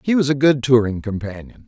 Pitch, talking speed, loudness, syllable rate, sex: 125 Hz, 215 wpm, -18 LUFS, 5.7 syllables/s, male